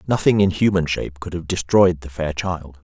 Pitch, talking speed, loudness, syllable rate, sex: 85 Hz, 205 wpm, -20 LUFS, 5.2 syllables/s, male